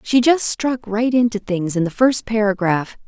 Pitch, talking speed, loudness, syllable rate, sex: 220 Hz, 195 wpm, -18 LUFS, 4.5 syllables/s, female